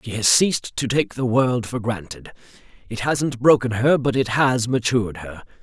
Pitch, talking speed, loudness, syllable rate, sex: 120 Hz, 190 wpm, -20 LUFS, 4.8 syllables/s, male